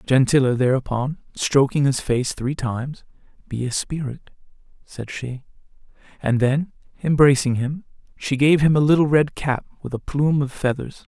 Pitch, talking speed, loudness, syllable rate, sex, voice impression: 135 Hz, 150 wpm, -21 LUFS, 4.8 syllables/s, male, masculine, adult-like, slightly cool, sincere, friendly